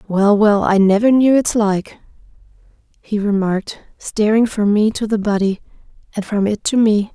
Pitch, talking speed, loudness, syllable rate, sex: 210 Hz, 170 wpm, -16 LUFS, 4.8 syllables/s, female